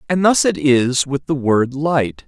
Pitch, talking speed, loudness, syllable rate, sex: 145 Hz, 210 wpm, -16 LUFS, 3.8 syllables/s, male